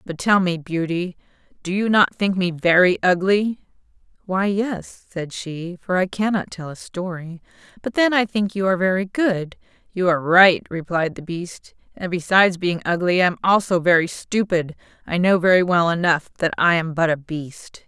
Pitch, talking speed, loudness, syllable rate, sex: 180 Hz, 185 wpm, -20 LUFS, 4.8 syllables/s, female